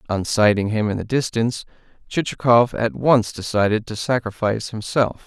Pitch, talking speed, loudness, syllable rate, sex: 110 Hz, 150 wpm, -20 LUFS, 5.2 syllables/s, male